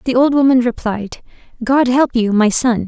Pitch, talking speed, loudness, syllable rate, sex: 245 Hz, 190 wpm, -14 LUFS, 4.8 syllables/s, female